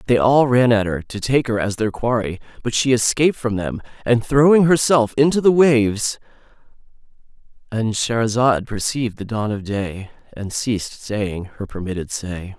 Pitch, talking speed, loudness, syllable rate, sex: 115 Hz, 160 wpm, -19 LUFS, 4.8 syllables/s, male